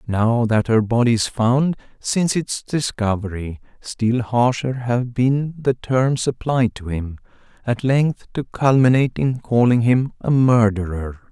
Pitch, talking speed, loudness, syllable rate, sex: 120 Hz, 145 wpm, -19 LUFS, 3.9 syllables/s, male